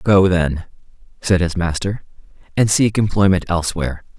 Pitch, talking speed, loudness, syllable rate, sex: 90 Hz, 130 wpm, -18 LUFS, 5.1 syllables/s, male